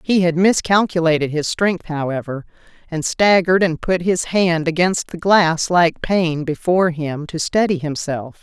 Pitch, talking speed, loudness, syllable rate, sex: 170 Hz, 155 wpm, -17 LUFS, 4.4 syllables/s, female